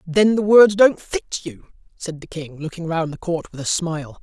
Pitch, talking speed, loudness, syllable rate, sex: 170 Hz, 225 wpm, -19 LUFS, 4.7 syllables/s, male